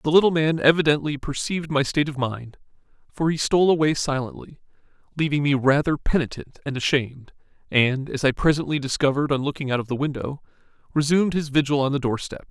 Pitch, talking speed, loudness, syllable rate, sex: 145 Hz, 175 wpm, -22 LUFS, 6.2 syllables/s, male